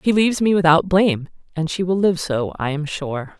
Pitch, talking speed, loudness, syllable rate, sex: 170 Hz, 230 wpm, -19 LUFS, 5.4 syllables/s, female